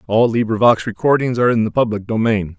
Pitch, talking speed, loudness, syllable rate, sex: 110 Hz, 185 wpm, -16 LUFS, 6.3 syllables/s, male